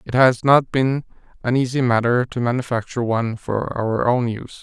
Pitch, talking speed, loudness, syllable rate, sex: 120 Hz, 180 wpm, -20 LUFS, 5.4 syllables/s, male